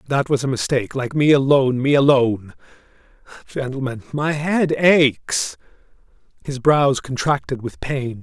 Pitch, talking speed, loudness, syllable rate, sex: 135 Hz, 130 wpm, -19 LUFS, 4.7 syllables/s, male